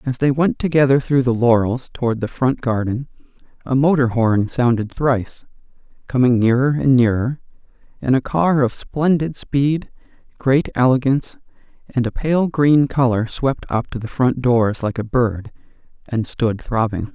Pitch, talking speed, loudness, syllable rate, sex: 125 Hz, 155 wpm, -18 LUFS, 4.5 syllables/s, male